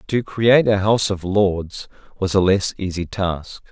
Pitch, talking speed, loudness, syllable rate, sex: 95 Hz, 180 wpm, -19 LUFS, 4.3 syllables/s, male